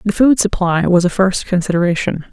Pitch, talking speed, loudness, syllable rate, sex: 185 Hz, 180 wpm, -15 LUFS, 5.5 syllables/s, female